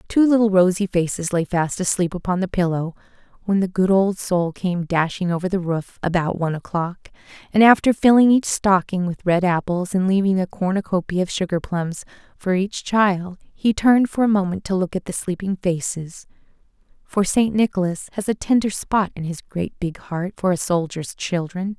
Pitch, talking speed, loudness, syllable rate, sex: 185 Hz, 185 wpm, -20 LUFS, 5.1 syllables/s, female